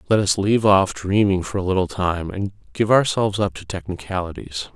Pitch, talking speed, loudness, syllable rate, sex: 95 Hz, 190 wpm, -21 LUFS, 5.5 syllables/s, male